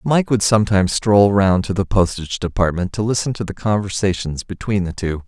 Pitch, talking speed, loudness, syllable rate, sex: 100 Hz, 195 wpm, -18 LUFS, 5.6 syllables/s, male